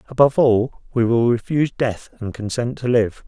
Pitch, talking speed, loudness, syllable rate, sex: 120 Hz, 185 wpm, -19 LUFS, 5.2 syllables/s, male